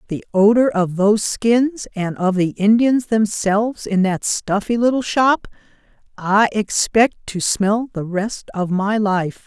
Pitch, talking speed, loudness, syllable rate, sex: 210 Hz, 150 wpm, -18 LUFS, 3.9 syllables/s, female